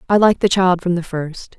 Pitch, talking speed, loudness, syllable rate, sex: 180 Hz, 265 wpm, -17 LUFS, 5.7 syllables/s, female